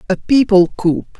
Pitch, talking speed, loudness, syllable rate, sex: 200 Hz, 150 wpm, -14 LUFS, 4.6 syllables/s, female